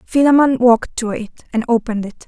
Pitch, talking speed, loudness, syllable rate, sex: 240 Hz, 185 wpm, -16 LUFS, 6.6 syllables/s, female